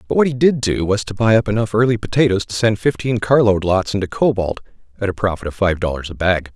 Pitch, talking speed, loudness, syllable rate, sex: 105 Hz, 245 wpm, -17 LUFS, 6.2 syllables/s, male